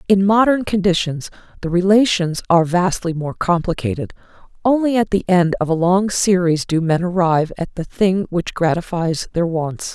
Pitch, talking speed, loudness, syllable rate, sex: 180 Hz, 165 wpm, -17 LUFS, 4.9 syllables/s, female